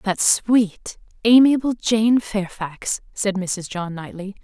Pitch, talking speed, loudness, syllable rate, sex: 205 Hz, 120 wpm, -19 LUFS, 3.3 syllables/s, female